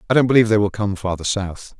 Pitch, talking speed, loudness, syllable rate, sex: 105 Hz, 270 wpm, -18 LUFS, 7.0 syllables/s, male